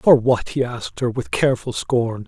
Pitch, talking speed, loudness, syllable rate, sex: 120 Hz, 210 wpm, -20 LUFS, 4.9 syllables/s, male